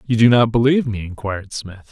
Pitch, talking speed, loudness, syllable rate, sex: 110 Hz, 220 wpm, -17 LUFS, 6.6 syllables/s, male